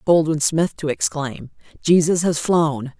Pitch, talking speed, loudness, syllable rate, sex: 155 Hz, 140 wpm, -19 LUFS, 3.9 syllables/s, female